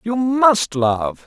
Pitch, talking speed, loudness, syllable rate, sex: 195 Hz, 140 wpm, -17 LUFS, 2.6 syllables/s, male